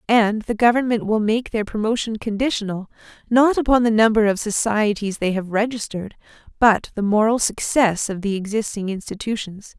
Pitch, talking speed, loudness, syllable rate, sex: 215 Hz, 155 wpm, -20 LUFS, 5.3 syllables/s, female